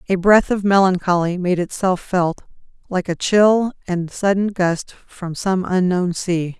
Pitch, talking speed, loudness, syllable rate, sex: 185 Hz, 155 wpm, -18 LUFS, 4.0 syllables/s, female